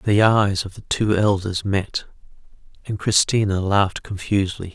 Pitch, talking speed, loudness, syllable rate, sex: 100 Hz, 140 wpm, -20 LUFS, 4.6 syllables/s, male